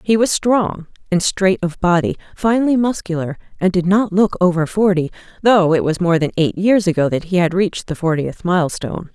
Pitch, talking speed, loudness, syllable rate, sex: 185 Hz, 195 wpm, -17 LUFS, 5.4 syllables/s, female